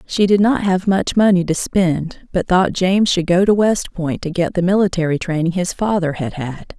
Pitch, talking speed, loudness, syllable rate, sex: 180 Hz, 220 wpm, -17 LUFS, 4.8 syllables/s, female